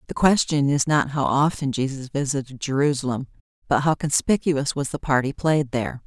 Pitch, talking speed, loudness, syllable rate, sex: 140 Hz, 180 wpm, -22 LUFS, 5.3 syllables/s, female